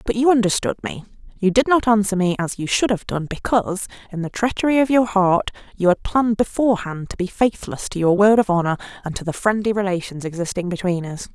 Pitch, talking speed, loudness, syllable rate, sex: 200 Hz, 215 wpm, -20 LUFS, 6.0 syllables/s, female